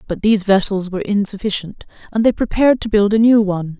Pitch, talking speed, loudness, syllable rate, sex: 205 Hz, 205 wpm, -16 LUFS, 6.5 syllables/s, female